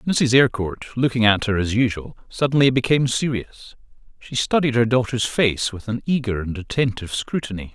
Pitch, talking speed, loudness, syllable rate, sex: 120 Hz, 165 wpm, -20 LUFS, 5.5 syllables/s, male